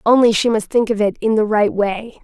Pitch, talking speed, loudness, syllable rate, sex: 220 Hz, 270 wpm, -16 LUFS, 5.3 syllables/s, female